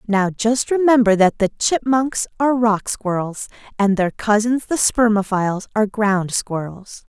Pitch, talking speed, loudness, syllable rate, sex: 215 Hz, 140 wpm, -18 LUFS, 4.4 syllables/s, female